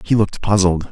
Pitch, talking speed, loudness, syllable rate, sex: 100 Hz, 195 wpm, -17 LUFS, 6.2 syllables/s, male